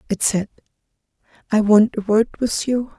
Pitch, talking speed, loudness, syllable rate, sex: 215 Hz, 160 wpm, -18 LUFS, 5.0 syllables/s, female